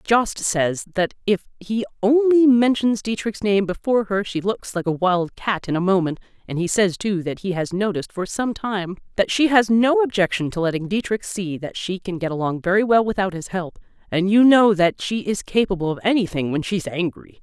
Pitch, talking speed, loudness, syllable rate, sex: 195 Hz, 215 wpm, -20 LUFS, 5.2 syllables/s, female